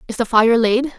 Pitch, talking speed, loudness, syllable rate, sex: 230 Hz, 245 wpm, -15 LUFS, 5.1 syllables/s, female